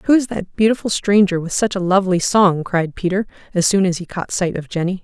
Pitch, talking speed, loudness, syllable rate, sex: 190 Hz, 240 wpm, -18 LUFS, 5.7 syllables/s, female